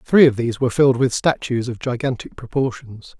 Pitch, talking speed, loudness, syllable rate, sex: 125 Hz, 190 wpm, -19 LUFS, 5.9 syllables/s, male